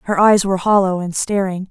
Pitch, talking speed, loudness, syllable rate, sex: 190 Hz, 210 wpm, -16 LUFS, 5.8 syllables/s, female